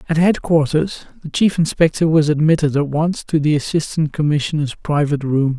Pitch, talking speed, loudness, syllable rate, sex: 155 Hz, 160 wpm, -17 LUFS, 5.3 syllables/s, male